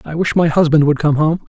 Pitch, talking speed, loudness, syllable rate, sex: 155 Hz, 270 wpm, -14 LUFS, 5.8 syllables/s, male